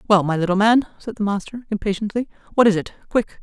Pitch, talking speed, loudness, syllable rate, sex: 210 Hz, 210 wpm, -20 LUFS, 6.6 syllables/s, female